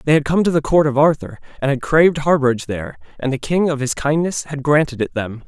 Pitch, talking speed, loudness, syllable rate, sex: 145 Hz, 250 wpm, -18 LUFS, 6.3 syllables/s, male